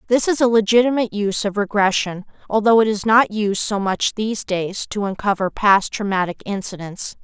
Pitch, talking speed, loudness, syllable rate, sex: 205 Hz, 175 wpm, -19 LUFS, 5.4 syllables/s, female